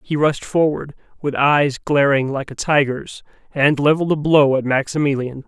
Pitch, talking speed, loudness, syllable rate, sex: 140 Hz, 165 wpm, -18 LUFS, 4.8 syllables/s, male